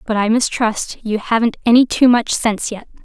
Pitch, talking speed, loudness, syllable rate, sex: 225 Hz, 195 wpm, -16 LUFS, 5.2 syllables/s, female